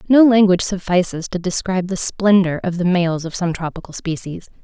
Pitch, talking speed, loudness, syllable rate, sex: 180 Hz, 180 wpm, -18 LUFS, 5.5 syllables/s, female